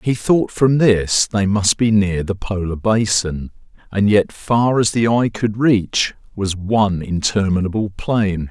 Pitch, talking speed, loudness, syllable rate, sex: 105 Hz, 160 wpm, -17 LUFS, 3.9 syllables/s, male